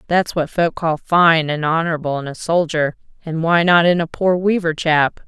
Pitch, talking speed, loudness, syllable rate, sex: 165 Hz, 205 wpm, -17 LUFS, 4.8 syllables/s, female